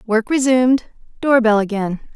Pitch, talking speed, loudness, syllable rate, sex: 235 Hz, 140 wpm, -17 LUFS, 5.0 syllables/s, female